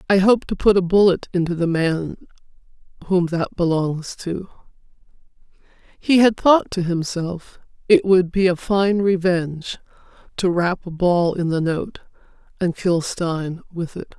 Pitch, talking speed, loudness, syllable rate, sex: 180 Hz, 150 wpm, -19 LUFS, 4.3 syllables/s, female